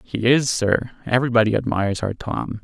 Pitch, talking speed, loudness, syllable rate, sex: 115 Hz, 160 wpm, -20 LUFS, 5.3 syllables/s, male